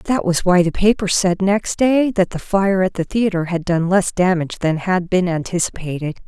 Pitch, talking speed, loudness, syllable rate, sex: 185 Hz, 210 wpm, -18 LUFS, 4.9 syllables/s, female